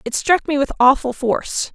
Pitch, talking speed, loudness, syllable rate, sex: 270 Hz, 205 wpm, -17 LUFS, 5.1 syllables/s, female